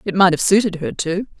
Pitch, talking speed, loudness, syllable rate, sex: 185 Hz, 255 wpm, -17 LUFS, 5.8 syllables/s, female